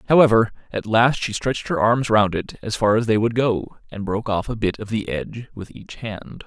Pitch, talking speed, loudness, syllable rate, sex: 110 Hz, 240 wpm, -21 LUFS, 5.3 syllables/s, male